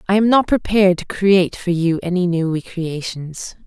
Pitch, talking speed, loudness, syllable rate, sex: 180 Hz, 180 wpm, -17 LUFS, 5.0 syllables/s, female